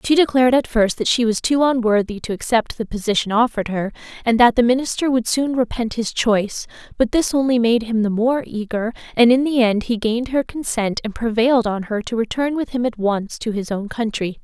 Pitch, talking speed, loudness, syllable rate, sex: 235 Hz, 225 wpm, -19 LUFS, 5.6 syllables/s, female